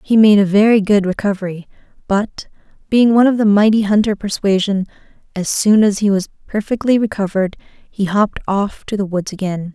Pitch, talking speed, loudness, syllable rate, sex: 205 Hz, 170 wpm, -15 LUFS, 5.5 syllables/s, female